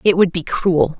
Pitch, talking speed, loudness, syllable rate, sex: 175 Hz, 240 wpm, -17 LUFS, 4.5 syllables/s, female